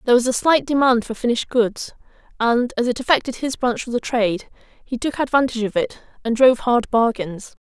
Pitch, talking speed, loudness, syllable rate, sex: 245 Hz, 205 wpm, -19 LUFS, 6.0 syllables/s, female